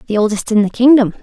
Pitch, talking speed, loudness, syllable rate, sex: 225 Hz, 245 wpm, -13 LUFS, 6.1 syllables/s, female